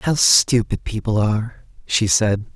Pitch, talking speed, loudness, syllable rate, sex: 110 Hz, 140 wpm, -18 LUFS, 4.2 syllables/s, male